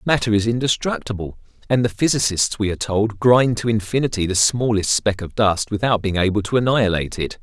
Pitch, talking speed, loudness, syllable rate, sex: 110 Hz, 185 wpm, -19 LUFS, 5.8 syllables/s, male